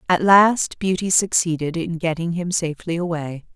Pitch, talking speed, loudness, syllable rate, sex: 170 Hz, 150 wpm, -19 LUFS, 4.9 syllables/s, female